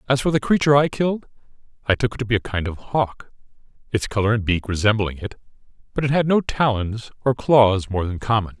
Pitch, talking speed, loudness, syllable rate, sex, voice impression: 115 Hz, 215 wpm, -21 LUFS, 5.9 syllables/s, male, masculine, adult-like, slightly thick, sincere, slightly friendly, slightly wild